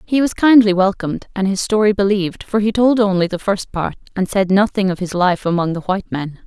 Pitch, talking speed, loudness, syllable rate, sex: 195 Hz, 230 wpm, -17 LUFS, 5.8 syllables/s, female